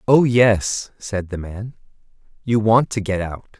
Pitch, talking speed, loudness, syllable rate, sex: 105 Hz, 165 wpm, -19 LUFS, 3.8 syllables/s, male